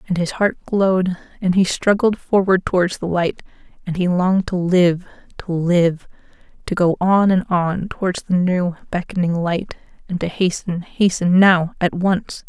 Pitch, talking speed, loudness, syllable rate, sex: 180 Hz, 170 wpm, -18 LUFS, 4.4 syllables/s, female